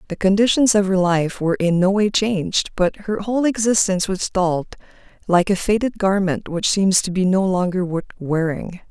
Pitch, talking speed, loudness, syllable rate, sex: 190 Hz, 190 wpm, -19 LUFS, 5.2 syllables/s, female